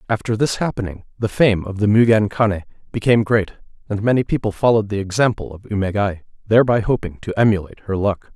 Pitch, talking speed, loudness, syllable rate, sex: 105 Hz, 170 wpm, -19 LUFS, 6.4 syllables/s, male